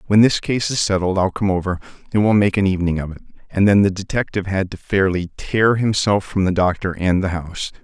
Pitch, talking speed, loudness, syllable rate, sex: 95 Hz, 230 wpm, -18 LUFS, 5.9 syllables/s, male